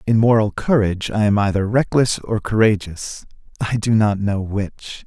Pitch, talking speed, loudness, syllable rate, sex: 105 Hz, 165 wpm, -18 LUFS, 4.6 syllables/s, male